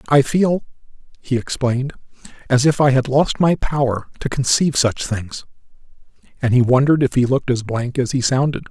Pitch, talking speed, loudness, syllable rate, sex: 135 Hz, 180 wpm, -18 LUFS, 5.5 syllables/s, male